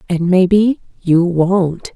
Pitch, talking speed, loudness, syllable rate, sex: 180 Hz, 125 wpm, -14 LUFS, 3.2 syllables/s, female